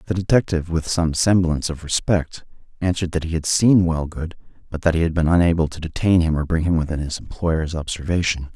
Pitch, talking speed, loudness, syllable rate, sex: 80 Hz, 205 wpm, -20 LUFS, 6.0 syllables/s, male